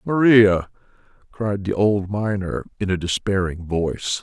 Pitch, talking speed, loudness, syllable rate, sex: 100 Hz, 130 wpm, -20 LUFS, 4.1 syllables/s, male